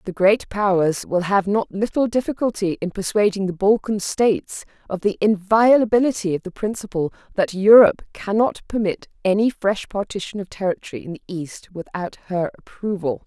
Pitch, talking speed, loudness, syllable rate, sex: 200 Hz, 155 wpm, -20 LUFS, 5.2 syllables/s, female